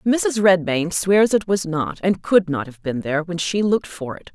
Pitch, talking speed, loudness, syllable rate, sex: 175 Hz, 235 wpm, -19 LUFS, 4.7 syllables/s, female